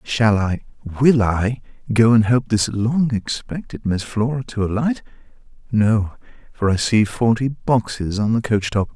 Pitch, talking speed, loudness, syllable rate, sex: 115 Hz, 140 wpm, -19 LUFS, 4.1 syllables/s, male